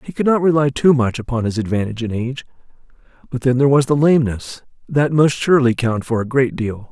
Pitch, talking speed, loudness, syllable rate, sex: 130 Hz, 215 wpm, -17 LUFS, 6.1 syllables/s, male